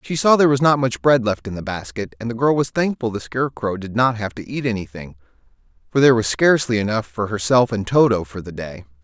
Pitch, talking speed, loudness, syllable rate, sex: 115 Hz, 240 wpm, -19 LUFS, 6.1 syllables/s, male